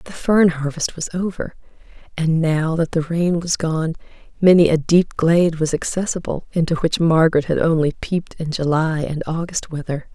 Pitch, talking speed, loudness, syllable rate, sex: 165 Hz, 170 wpm, -19 LUFS, 5.0 syllables/s, female